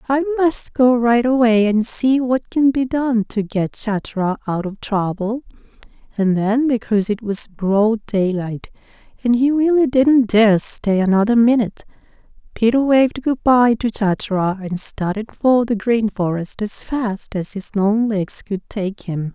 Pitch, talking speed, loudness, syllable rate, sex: 225 Hz, 165 wpm, -18 LUFS, 4.2 syllables/s, female